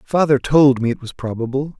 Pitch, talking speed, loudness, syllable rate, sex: 135 Hz, 200 wpm, -17 LUFS, 5.3 syllables/s, male